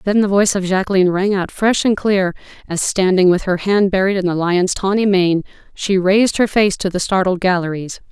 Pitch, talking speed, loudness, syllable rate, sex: 190 Hz, 215 wpm, -16 LUFS, 5.5 syllables/s, female